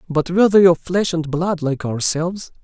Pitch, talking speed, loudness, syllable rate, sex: 170 Hz, 205 wpm, -17 LUFS, 5.1 syllables/s, male